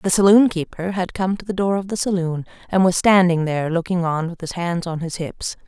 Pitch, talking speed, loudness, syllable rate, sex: 180 Hz, 245 wpm, -20 LUFS, 5.4 syllables/s, female